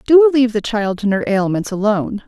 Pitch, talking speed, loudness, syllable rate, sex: 220 Hz, 210 wpm, -16 LUFS, 5.9 syllables/s, female